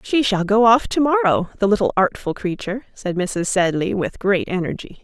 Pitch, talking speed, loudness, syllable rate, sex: 205 Hz, 190 wpm, -19 LUFS, 5.2 syllables/s, female